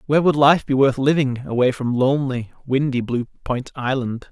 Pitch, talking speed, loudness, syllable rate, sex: 130 Hz, 180 wpm, -20 LUFS, 5.0 syllables/s, male